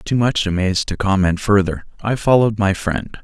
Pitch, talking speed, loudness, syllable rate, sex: 100 Hz, 185 wpm, -18 LUFS, 5.7 syllables/s, male